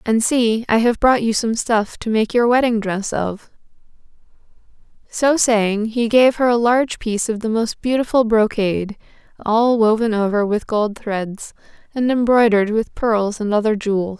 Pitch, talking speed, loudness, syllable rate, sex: 225 Hz, 170 wpm, -17 LUFS, 4.6 syllables/s, female